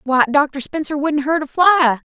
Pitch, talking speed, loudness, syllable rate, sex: 290 Hz, 200 wpm, -16 LUFS, 4.3 syllables/s, female